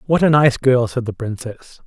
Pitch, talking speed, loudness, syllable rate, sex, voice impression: 130 Hz, 225 wpm, -16 LUFS, 4.8 syllables/s, male, very masculine, adult-like, middle-aged, thick, slightly tensed, slightly powerful, slightly dark, slightly soft, slightly muffled, fluent, slightly raspy, cool, very intellectual, slightly refreshing, sincere, calm, very friendly, reassuring, elegant, sweet, slightly lively, kind, slightly modest